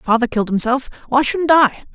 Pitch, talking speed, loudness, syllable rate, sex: 255 Hz, 155 wpm, -16 LUFS, 5.7 syllables/s, female